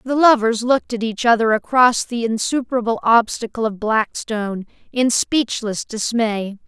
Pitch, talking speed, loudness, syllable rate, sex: 230 Hz, 135 wpm, -18 LUFS, 4.7 syllables/s, female